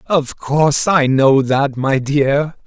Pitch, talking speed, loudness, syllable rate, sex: 140 Hz, 155 wpm, -15 LUFS, 3.2 syllables/s, male